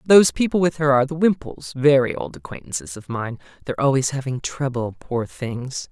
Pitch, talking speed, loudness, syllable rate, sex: 130 Hz, 185 wpm, -21 LUFS, 5.6 syllables/s, male